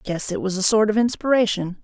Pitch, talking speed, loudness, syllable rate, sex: 205 Hz, 230 wpm, -20 LUFS, 5.8 syllables/s, female